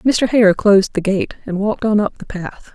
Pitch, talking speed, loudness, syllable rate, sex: 200 Hz, 240 wpm, -16 LUFS, 5.0 syllables/s, female